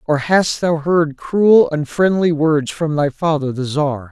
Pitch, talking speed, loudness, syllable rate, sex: 155 Hz, 175 wpm, -16 LUFS, 3.8 syllables/s, male